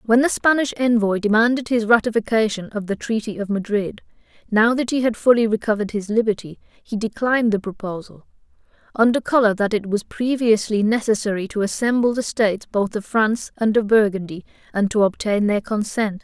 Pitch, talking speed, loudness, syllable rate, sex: 220 Hz, 170 wpm, -20 LUFS, 5.5 syllables/s, female